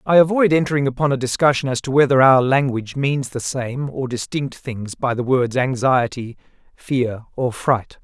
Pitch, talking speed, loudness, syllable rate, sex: 130 Hz, 180 wpm, -19 LUFS, 4.9 syllables/s, male